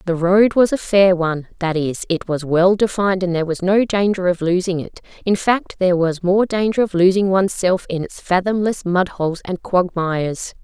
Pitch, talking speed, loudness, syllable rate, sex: 185 Hz, 210 wpm, -18 LUFS, 5.3 syllables/s, female